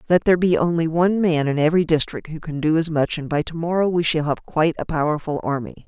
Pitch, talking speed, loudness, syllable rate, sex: 160 Hz, 255 wpm, -20 LUFS, 6.5 syllables/s, female